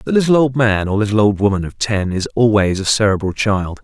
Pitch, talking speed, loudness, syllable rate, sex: 105 Hz, 235 wpm, -16 LUFS, 5.8 syllables/s, male